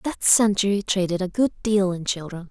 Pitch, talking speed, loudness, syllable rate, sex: 195 Hz, 190 wpm, -21 LUFS, 4.9 syllables/s, female